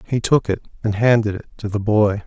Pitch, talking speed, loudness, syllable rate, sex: 110 Hz, 240 wpm, -19 LUFS, 5.5 syllables/s, male